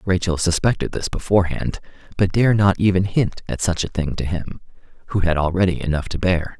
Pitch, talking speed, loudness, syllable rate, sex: 90 Hz, 190 wpm, -20 LUFS, 5.6 syllables/s, male